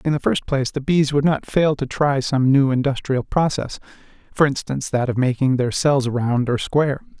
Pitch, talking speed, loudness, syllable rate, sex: 135 Hz, 210 wpm, -19 LUFS, 5.1 syllables/s, male